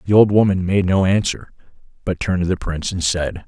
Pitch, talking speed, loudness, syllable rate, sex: 90 Hz, 225 wpm, -18 LUFS, 6.1 syllables/s, male